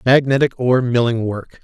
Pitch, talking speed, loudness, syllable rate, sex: 125 Hz, 145 wpm, -17 LUFS, 5.3 syllables/s, male